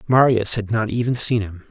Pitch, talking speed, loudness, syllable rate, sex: 110 Hz, 210 wpm, -19 LUFS, 5.2 syllables/s, male